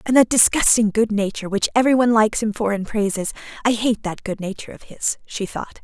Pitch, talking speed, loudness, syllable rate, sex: 220 Hz, 215 wpm, -19 LUFS, 6.3 syllables/s, female